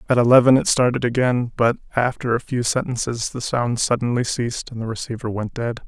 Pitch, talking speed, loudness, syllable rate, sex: 120 Hz, 195 wpm, -20 LUFS, 5.7 syllables/s, male